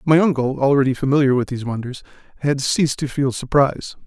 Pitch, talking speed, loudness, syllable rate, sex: 135 Hz, 175 wpm, -19 LUFS, 6.3 syllables/s, male